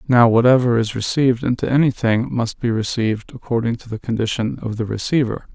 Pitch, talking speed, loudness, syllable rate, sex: 120 Hz, 175 wpm, -19 LUFS, 5.8 syllables/s, male